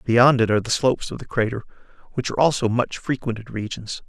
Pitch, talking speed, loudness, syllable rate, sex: 120 Hz, 205 wpm, -22 LUFS, 6.4 syllables/s, male